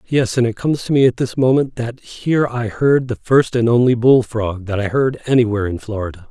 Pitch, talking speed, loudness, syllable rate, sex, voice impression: 120 Hz, 240 wpm, -17 LUFS, 5.6 syllables/s, male, masculine, middle-aged, slightly powerful, slightly hard, slightly cool, intellectual, sincere, calm, mature, unique, wild, slightly lively, slightly kind